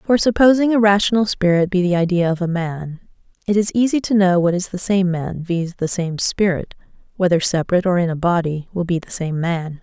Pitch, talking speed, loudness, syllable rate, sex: 185 Hz, 210 wpm, -18 LUFS, 5.6 syllables/s, female